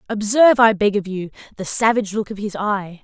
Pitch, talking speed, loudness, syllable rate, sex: 205 Hz, 215 wpm, -17 LUFS, 5.9 syllables/s, female